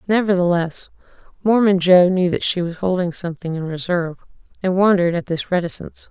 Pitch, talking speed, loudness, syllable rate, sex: 180 Hz, 155 wpm, -18 LUFS, 5.9 syllables/s, female